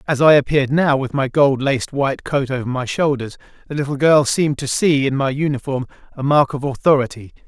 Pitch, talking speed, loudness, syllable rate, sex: 135 Hz, 210 wpm, -18 LUFS, 5.9 syllables/s, male